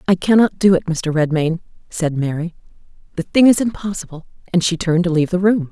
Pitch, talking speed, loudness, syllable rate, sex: 175 Hz, 210 wpm, -17 LUFS, 6.2 syllables/s, female